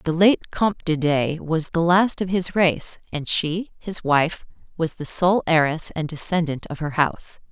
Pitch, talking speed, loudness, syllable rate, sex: 165 Hz, 190 wpm, -21 LUFS, 4.3 syllables/s, female